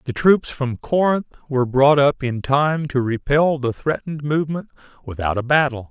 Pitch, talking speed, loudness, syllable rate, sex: 140 Hz, 175 wpm, -19 LUFS, 5.0 syllables/s, male